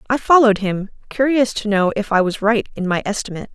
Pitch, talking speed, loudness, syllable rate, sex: 215 Hz, 220 wpm, -17 LUFS, 6.3 syllables/s, female